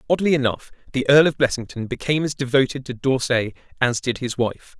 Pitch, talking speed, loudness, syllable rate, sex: 130 Hz, 190 wpm, -21 LUFS, 5.9 syllables/s, male